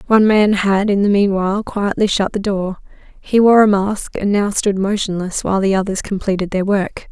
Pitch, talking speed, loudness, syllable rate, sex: 200 Hz, 205 wpm, -16 LUFS, 5.2 syllables/s, female